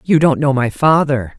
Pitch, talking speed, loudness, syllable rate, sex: 145 Hz, 215 wpm, -14 LUFS, 4.7 syllables/s, female